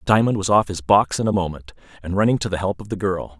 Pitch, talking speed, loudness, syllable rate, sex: 95 Hz, 285 wpm, -20 LUFS, 6.3 syllables/s, male